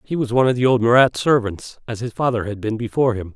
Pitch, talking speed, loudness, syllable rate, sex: 115 Hz, 270 wpm, -19 LUFS, 6.6 syllables/s, male